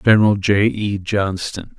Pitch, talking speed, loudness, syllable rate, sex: 100 Hz, 135 wpm, -18 LUFS, 4.1 syllables/s, male